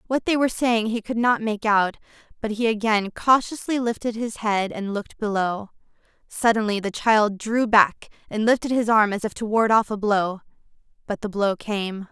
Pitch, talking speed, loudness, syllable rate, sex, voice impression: 215 Hz, 195 wpm, -22 LUFS, 5.0 syllables/s, female, very feminine, slightly adult-like, thin, tensed, slightly powerful, very bright, slightly soft, very clear, very fluent, cute, slightly cool, very intellectual, refreshing, sincere, very calm, friendly, reassuring, unique, slightly elegant, sweet, lively, kind, slightly sharp, modest, light